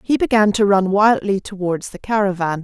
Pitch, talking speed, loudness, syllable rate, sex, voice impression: 200 Hz, 180 wpm, -17 LUFS, 5.1 syllables/s, female, very feminine, very middle-aged, very thin, tensed, slightly powerful, bright, slightly soft, clear, fluent, slightly cool, intellectual, refreshing, very sincere, very calm, friendly, very reassuring, slightly unique, slightly elegant, wild, slightly sweet, lively, slightly strict, slightly intense, slightly sharp